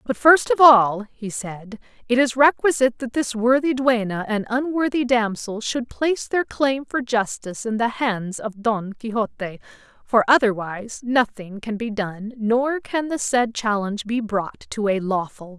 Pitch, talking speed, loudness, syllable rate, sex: 235 Hz, 175 wpm, -21 LUFS, 4.6 syllables/s, female